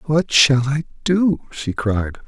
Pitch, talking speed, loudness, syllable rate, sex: 145 Hz, 160 wpm, -18 LUFS, 3.4 syllables/s, male